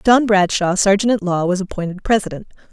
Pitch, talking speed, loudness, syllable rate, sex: 195 Hz, 175 wpm, -17 LUFS, 5.9 syllables/s, female